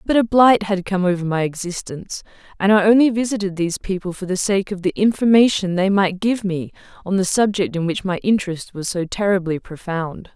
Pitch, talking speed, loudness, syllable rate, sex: 190 Hz, 205 wpm, -19 LUFS, 5.5 syllables/s, female